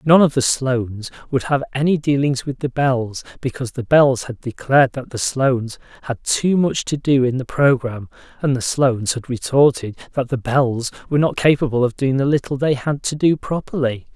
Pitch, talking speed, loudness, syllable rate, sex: 130 Hz, 200 wpm, -19 LUFS, 5.2 syllables/s, male